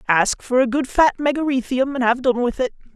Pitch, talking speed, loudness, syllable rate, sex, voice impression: 255 Hz, 225 wpm, -19 LUFS, 5.4 syllables/s, female, very feminine, adult-like, slightly middle-aged, very thin, very tensed, powerful, very bright, hard, very clear, very fluent, slightly cute, cool, slightly intellectual, refreshing, slightly calm, very unique, slightly elegant, very lively, strict, intense